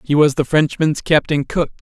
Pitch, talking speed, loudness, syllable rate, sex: 150 Hz, 190 wpm, -17 LUFS, 4.9 syllables/s, male